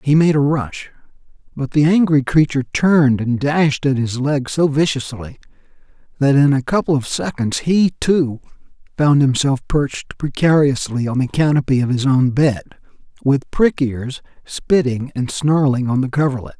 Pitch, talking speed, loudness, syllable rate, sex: 140 Hz, 160 wpm, -17 LUFS, 4.7 syllables/s, male